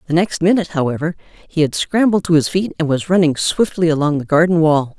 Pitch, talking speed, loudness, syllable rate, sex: 165 Hz, 215 wpm, -16 LUFS, 5.9 syllables/s, female